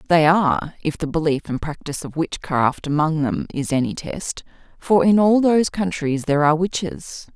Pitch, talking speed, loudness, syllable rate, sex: 160 Hz, 180 wpm, -20 LUFS, 5.2 syllables/s, female